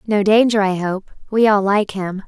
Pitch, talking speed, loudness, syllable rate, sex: 205 Hz, 210 wpm, -17 LUFS, 4.6 syllables/s, female